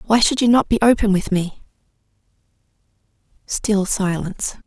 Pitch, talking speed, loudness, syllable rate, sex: 205 Hz, 130 wpm, -18 LUFS, 5.0 syllables/s, female